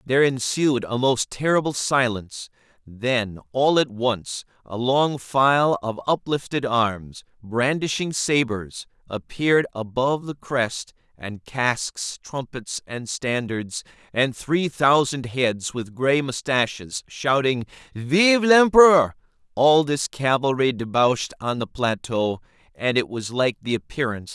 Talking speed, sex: 130 wpm, male